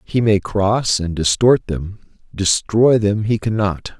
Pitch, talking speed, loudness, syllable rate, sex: 100 Hz, 135 wpm, -17 LUFS, 3.7 syllables/s, male